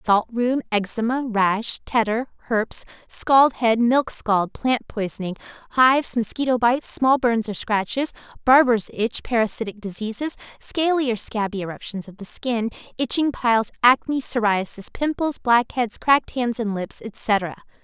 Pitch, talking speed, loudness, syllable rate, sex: 235 Hz, 140 wpm, -21 LUFS, 4.6 syllables/s, female